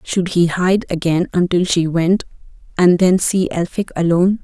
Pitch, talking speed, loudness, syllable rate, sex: 180 Hz, 160 wpm, -16 LUFS, 4.6 syllables/s, female